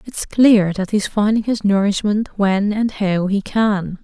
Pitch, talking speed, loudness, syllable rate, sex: 205 Hz, 180 wpm, -17 LUFS, 3.9 syllables/s, female